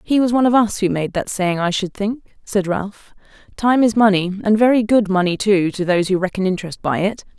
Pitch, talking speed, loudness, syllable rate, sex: 200 Hz, 235 wpm, -18 LUFS, 5.6 syllables/s, female